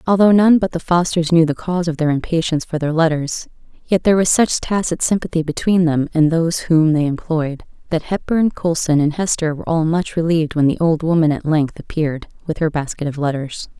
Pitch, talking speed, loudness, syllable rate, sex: 165 Hz, 210 wpm, -17 LUFS, 5.7 syllables/s, female